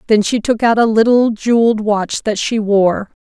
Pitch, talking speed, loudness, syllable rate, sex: 220 Hz, 205 wpm, -14 LUFS, 4.7 syllables/s, female